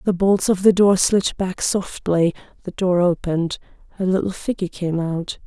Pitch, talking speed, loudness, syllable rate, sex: 185 Hz, 175 wpm, -20 LUFS, 4.8 syllables/s, female